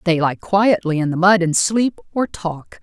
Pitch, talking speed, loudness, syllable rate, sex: 175 Hz, 215 wpm, -18 LUFS, 4.2 syllables/s, female